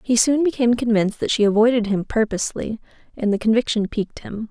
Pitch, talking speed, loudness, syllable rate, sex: 225 Hz, 185 wpm, -20 LUFS, 6.5 syllables/s, female